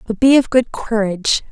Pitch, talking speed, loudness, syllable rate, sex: 225 Hz, 200 wpm, -15 LUFS, 5.3 syllables/s, female